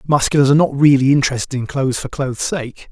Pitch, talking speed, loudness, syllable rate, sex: 135 Hz, 205 wpm, -16 LUFS, 7.0 syllables/s, male